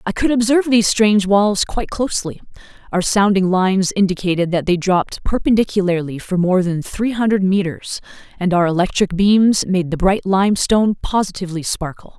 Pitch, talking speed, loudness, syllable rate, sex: 195 Hz, 160 wpm, -17 LUFS, 5.6 syllables/s, female